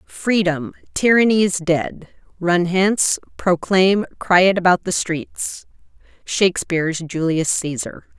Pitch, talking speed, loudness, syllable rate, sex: 180 Hz, 110 wpm, -18 LUFS, 3.9 syllables/s, female